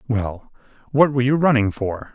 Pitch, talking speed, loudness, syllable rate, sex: 120 Hz, 170 wpm, -19 LUFS, 5.0 syllables/s, male